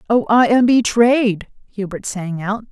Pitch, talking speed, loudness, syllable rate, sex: 215 Hz, 155 wpm, -16 LUFS, 3.9 syllables/s, female